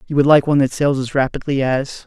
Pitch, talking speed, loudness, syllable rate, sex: 135 Hz, 260 wpm, -17 LUFS, 6.1 syllables/s, male